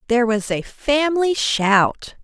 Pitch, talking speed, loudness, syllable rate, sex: 255 Hz, 135 wpm, -18 LUFS, 4.0 syllables/s, female